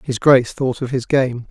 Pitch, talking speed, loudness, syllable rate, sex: 130 Hz, 240 wpm, -17 LUFS, 5.0 syllables/s, male